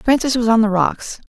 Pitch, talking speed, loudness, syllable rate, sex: 230 Hz, 230 wpm, -16 LUFS, 5.1 syllables/s, female